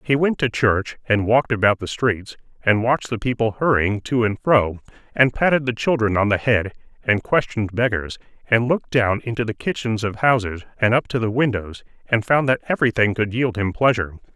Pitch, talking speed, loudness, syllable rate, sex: 115 Hz, 200 wpm, -20 LUFS, 5.5 syllables/s, male